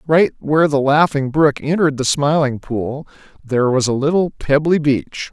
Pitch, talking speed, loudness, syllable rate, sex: 145 Hz, 170 wpm, -16 LUFS, 4.9 syllables/s, male